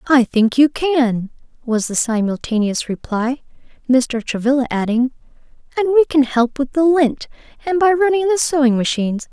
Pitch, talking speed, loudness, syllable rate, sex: 265 Hz, 155 wpm, -17 LUFS, 5.0 syllables/s, female